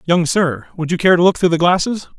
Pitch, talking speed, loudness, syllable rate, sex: 175 Hz, 275 wpm, -15 LUFS, 5.9 syllables/s, male